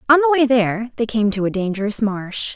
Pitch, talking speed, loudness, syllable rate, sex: 230 Hz, 235 wpm, -19 LUFS, 6.2 syllables/s, female